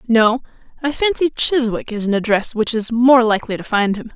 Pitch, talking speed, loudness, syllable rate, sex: 235 Hz, 200 wpm, -17 LUFS, 5.4 syllables/s, female